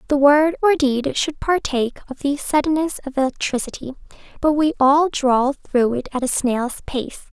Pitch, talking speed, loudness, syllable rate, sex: 280 Hz, 170 wpm, -19 LUFS, 4.7 syllables/s, female